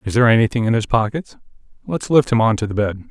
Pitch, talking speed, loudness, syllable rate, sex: 115 Hz, 230 wpm, -17 LUFS, 7.2 syllables/s, male